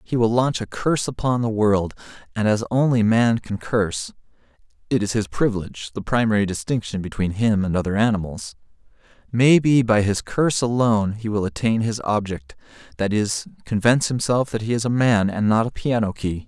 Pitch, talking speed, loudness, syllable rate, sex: 110 Hz, 180 wpm, -21 LUFS, 4.0 syllables/s, male